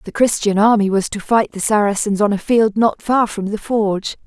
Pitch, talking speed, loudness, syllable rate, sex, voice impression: 210 Hz, 225 wpm, -16 LUFS, 5.2 syllables/s, female, feminine, adult-like, relaxed, soft, fluent, slightly raspy, slightly cute, slightly calm, friendly, reassuring, slightly elegant, kind, modest